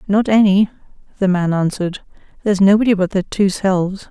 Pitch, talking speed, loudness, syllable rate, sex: 195 Hz, 160 wpm, -16 LUFS, 5.8 syllables/s, female